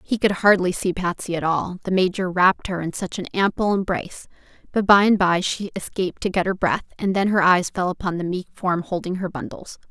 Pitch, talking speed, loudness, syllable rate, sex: 185 Hz, 230 wpm, -21 LUFS, 5.6 syllables/s, female